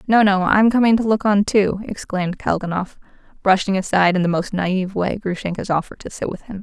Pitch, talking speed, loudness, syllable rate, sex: 195 Hz, 210 wpm, -19 LUFS, 5.8 syllables/s, female